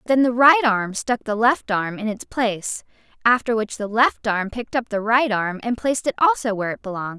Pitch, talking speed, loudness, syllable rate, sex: 225 Hz, 235 wpm, -20 LUFS, 5.5 syllables/s, female